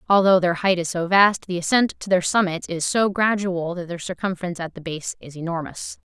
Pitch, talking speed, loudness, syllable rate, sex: 180 Hz, 215 wpm, -21 LUFS, 5.6 syllables/s, female